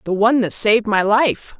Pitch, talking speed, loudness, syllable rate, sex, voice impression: 215 Hz, 225 wpm, -16 LUFS, 5.5 syllables/s, female, feminine, adult-like, slightly relaxed, slightly powerful, raspy, intellectual, slightly calm, lively, slightly strict, sharp